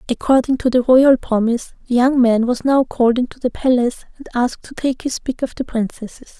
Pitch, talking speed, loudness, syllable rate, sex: 245 Hz, 215 wpm, -17 LUFS, 6.1 syllables/s, female